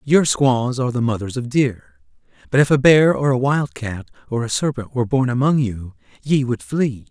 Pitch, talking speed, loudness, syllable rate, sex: 125 Hz, 205 wpm, -19 LUFS, 5.0 syllables/s, male